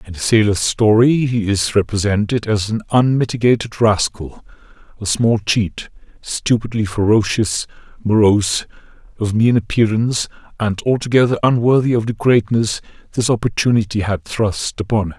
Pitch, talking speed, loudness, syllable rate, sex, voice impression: 110 Hz, 125 wpm, -17 LUFS, 5.0 syllables/s, male, very masculine, very adult-like, slightly old, very thick, tensed, very powerful, bright, slightly hard, slightly muffled, fluent, slightly raspy, cool, intellectual, sincere, very calm, very mature, friendly, very reassuring, unique, slightly elegant, wild, slightly sweet, slightly lively, kind, slightly modest